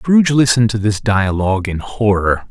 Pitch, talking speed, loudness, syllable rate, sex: 110 Hz, 170 wpm, -15 LUFS, 5.3 syllables/s, male